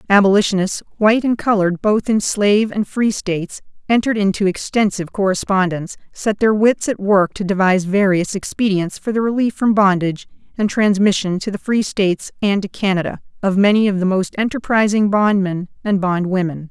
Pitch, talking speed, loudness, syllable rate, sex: 200 Hz, 165 wpm, -17 LUFS, 5.6 syllables/s, female